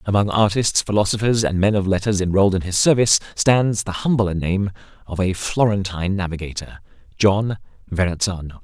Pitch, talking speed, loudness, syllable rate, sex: 100 Hz, 145 wpm, -19 LUFS, 5.7 syllables/s, male